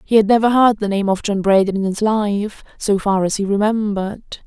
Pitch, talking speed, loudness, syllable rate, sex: 205 Hz, 215 wpm, -17 LUFS, 5.5 syllables/s, female